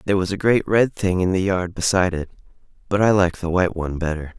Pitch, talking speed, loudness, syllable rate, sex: 95 Hz, 245 wpm, -20 LUFS, 6.8 syllables/s, male